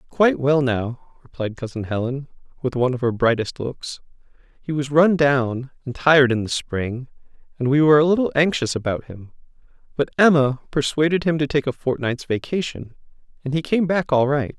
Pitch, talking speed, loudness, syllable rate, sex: 140 Hz, 180 wpm, -20 LUFS, 5.3 syllables/s, male